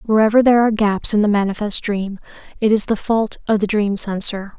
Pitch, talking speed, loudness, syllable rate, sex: 210 Hz, 210 wpm, -17 LUFS, 5.7 syllables/s, female